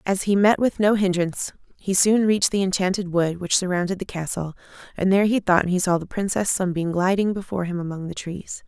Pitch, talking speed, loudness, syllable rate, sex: 185 Hz, 215 wpm, -22 LUFS, 5.8 syllables/s, female